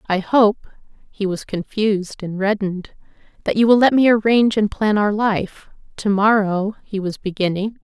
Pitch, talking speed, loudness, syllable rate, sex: 205 Hz, 145 wpm, -18 LUFS, 5.0 syllables/s, female